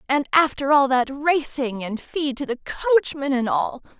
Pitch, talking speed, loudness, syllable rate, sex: 275 Hz, 180 wpm, -21 LUFS, 4.9 syllables/s, female